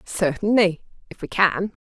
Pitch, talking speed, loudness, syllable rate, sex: 185 Hz, 100 wpm, -21 LUFS, 4.3 syllables/s, female